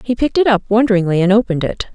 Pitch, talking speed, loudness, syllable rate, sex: 210 Hz, 245 wpm, -15 LUFS, 8.1 syllables/s, female